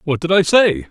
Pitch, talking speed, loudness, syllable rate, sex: 165 Hz, 265 wpm, -14 LUFS, 5.1 syllables/s, male